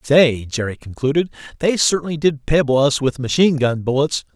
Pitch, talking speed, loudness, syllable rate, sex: 140 Hz, 150 wpm, -18 LUFS, 5.5 syllables/s, male